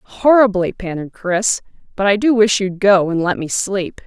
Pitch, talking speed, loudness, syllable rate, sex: 195 Hz, 190 wpm, -16 LUFS, 4.4 syllables/s, female